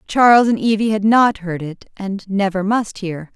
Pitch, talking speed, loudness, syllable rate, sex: 200 Hz, 195 wpm, -17 LUFS, 4.4 syllables/s, female